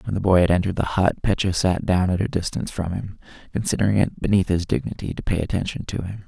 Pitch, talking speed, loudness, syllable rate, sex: 95 Hz, 240 wpm, -22 LUFS, 6.6 syllables/s, male